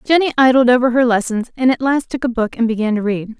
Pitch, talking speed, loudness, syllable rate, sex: 245 Hz, 265 wpm, -15 LUFS, 6.3 syllables/s, female